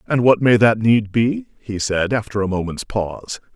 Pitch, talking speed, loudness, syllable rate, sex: 110 Hz, 205 wpm, -18 LUFS, 4.8 syllables/s, male